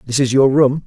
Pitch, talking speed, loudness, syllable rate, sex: 135 Hz, 275 wpm, -14 LUFS, 5.6 syllables/s, male